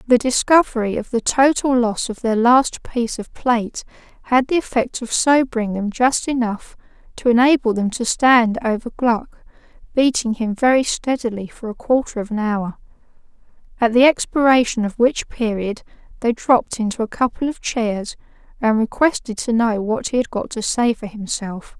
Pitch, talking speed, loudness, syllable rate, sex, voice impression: 235 Hz, 170 wpm, -18 LUFS, 4.9 syllables/s, female, feminine, adult-like, relaxed, weak, soft, slightly raspy, slightly cute, calm, friendly, reassuring, elegant, slightly sweet, kind, modest